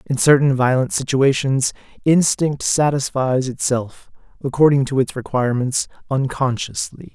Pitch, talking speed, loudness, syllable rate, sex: 135 Hz, 100 wpm, -18 LUFS, 4.5 syllables/s, male